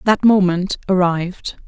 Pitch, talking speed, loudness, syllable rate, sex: 185 Hz, 105 wpm, -17 LUFS, 4.4 syllables/s, female